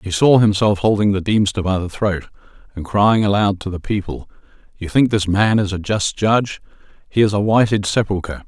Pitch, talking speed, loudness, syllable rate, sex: 100 Hz, 190 wpm, -17 LUFS, 5.3 syllables/s, male